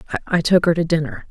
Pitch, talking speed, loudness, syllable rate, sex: 165 Hz, 230 wpm, -18 LUFS, 7.9 syllables/s, female